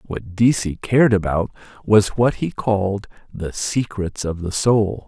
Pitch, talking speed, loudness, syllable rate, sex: 105 Hz, 155 wpm, -20 LUFS, 4.0 syllables/s, male